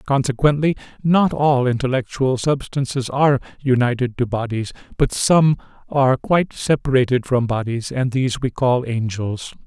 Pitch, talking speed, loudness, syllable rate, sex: 130 Hz, 130 wpm, -19 LUFS, 4.9 syllables/s, male